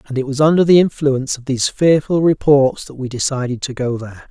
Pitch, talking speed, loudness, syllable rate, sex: 140 Hz, 225 wpm, -16 LUFS, 6.0 syllables/s, male